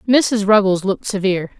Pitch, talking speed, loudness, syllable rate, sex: 200 Hz, 150 wpm, -16 LUFS, 5.9 syllables/s, female